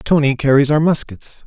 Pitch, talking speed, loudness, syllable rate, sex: 145 Hz, 165 wpm, -15 LUFS, 5.2 syllables/s, male